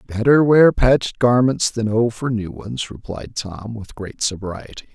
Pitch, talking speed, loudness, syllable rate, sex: 110 Hz, 170 wpm, -18 LUFS, 4.4 syllables/s, male